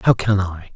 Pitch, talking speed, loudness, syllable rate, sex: 100 Hz, 240 wpm, -19 LUFS, 4.8 syllables/s, male